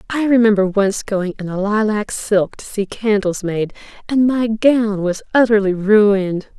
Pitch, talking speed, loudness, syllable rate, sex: 210 Hz, 165 wpm, -17 LUFS, 4.3 syllables/s, female